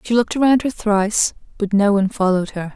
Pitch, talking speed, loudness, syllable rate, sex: 210 Hz, 215 wpm, -18 LUFS, 6.2 syllables/s, female